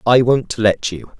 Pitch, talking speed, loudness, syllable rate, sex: 115 Hz, 200 wpm, -16 LUFS, 3.8 syllables/s, male